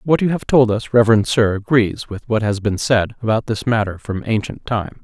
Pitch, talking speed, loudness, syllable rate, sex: 115 Hz, 225 wpm, -18 LUFS, 5.2 syllables/s, male